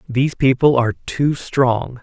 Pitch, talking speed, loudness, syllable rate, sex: 130 Hz, 150 wpm, -17 LUFS, 4.3 syllables/s, male